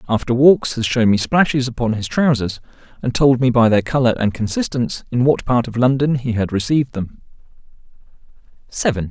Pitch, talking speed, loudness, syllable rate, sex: 120 Hz, 180 wpm, -17 LUFS, 5.6 syllables/s, male